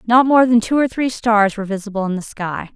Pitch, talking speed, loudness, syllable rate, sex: 220 Hz, 260 wpm, -17 LUFS, 5.8 syllables/s, female